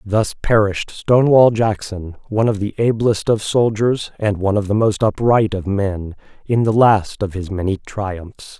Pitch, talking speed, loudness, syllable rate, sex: 105 Hz, 175 wpm, -17 LUFS, 4.6 syllables/s, male